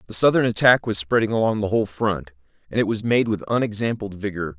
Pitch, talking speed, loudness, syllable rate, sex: 105 Hz, 210 wpm, -21 LUFS, 6.3 syllables/s, male